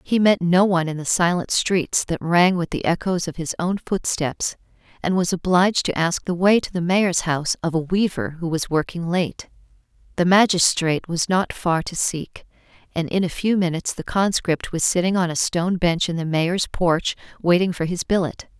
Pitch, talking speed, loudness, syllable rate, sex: 175 Hz, 205 wpm, -21 LUFS, 5.0 syllables/s, female